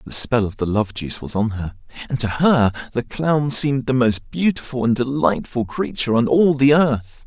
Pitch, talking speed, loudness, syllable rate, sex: 125 Hz, 205 wpm, -19 LUFS, 5.0 syllables/s, male